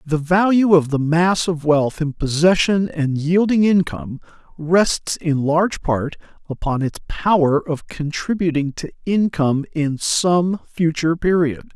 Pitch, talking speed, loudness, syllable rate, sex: 165 Hz, 140 wpm, -18 LUFS, 4.2 syllables/s, male